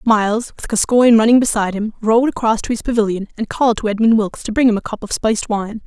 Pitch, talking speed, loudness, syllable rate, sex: 220 Hz, 245 wpm, -16 LUFS, 6.7 syllables/s, female